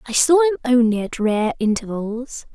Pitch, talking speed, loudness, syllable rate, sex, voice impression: 245 Hz, 165 wpm, -19 LUFS, 5.0 syllables/s, female, feminine, slightly young, slightly soft, cute, slightly refreshing, friendly